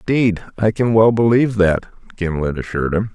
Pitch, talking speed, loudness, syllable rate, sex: 100 Hz, 170 wpm, -17 LUFS, 5.8 syllables/s, male